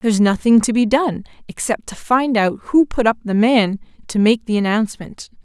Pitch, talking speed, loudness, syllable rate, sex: 225 Hz, 200 wpm, -17 LUFS, 5.2 syllables/s, female